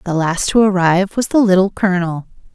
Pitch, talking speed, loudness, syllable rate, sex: 190 Hz, 190 wpm, -15 LUFS, 6.0 syllables/s, female